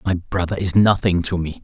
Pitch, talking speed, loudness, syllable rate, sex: 90 Hz, 220 wpm, -19 LUFS, 5.2 syllables/s, male